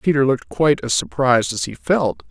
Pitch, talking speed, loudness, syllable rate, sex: 125 Hz, 210 wpm, -18 LUFS, 6.0 syllables/s, male